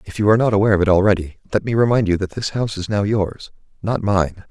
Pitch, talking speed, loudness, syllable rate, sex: 100 Hz, 265 wpm, -18 LUFS, 6.8 syllables/s, male